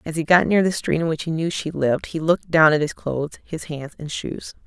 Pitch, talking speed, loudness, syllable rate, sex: 160 Hz, 285 wpm, -21 LUFS, 5.7 syllables/s, female